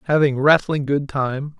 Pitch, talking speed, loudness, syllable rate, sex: 140 Hz, 150 wpm, -19 LUFS, 4.2 syllables/s, male